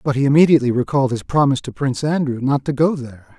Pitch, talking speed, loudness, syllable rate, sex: 135 Hz, 230 wpm, -17 LUFS, 7.3 syllables/s, male